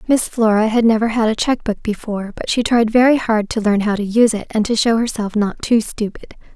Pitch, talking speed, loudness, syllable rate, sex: 220 Hz, 245 wpm, -17 LUFS, 5.7 syllables/s, female